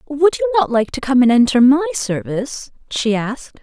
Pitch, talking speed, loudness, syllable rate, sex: 260 Hz, 200 wpm, -16 LUFS, 5.8 syllables/s, female